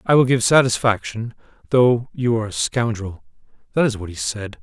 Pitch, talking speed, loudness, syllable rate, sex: 110 Hz, 170 wpm, -19 LUFS, 5.0 syllables/s, male